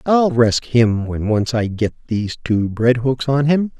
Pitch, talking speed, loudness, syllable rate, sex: 120 Hz, 205 wpm, -17 LUFS, 4.1 syllables/s, male